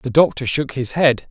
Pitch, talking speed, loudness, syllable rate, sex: 135 Hz, 230 wpm, -18 LUFS, 4.7 syllables/s, male